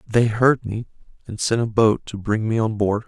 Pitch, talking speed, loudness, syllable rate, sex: 110 Hz, 235 wpm, -21 LUFS, 4.8 syllables/s, male